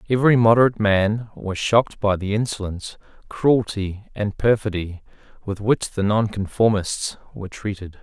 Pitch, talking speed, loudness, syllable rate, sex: 105 Hz, 125 wpm, -21 LUFS, 5.0 syllables/s, male